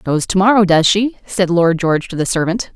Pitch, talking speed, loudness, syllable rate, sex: 185 Hz, 240 wpm, -14 LUFS, 5.3 syllables/s, female